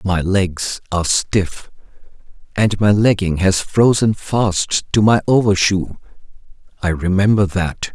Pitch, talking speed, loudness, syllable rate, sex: 95 Hz, 120 wpm, -16 LUFS, 3.8 syllables/s, male